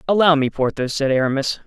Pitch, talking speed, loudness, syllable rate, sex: 145 Hz, 180 wpm, -18 LUFS, 6.1 syllables/s, male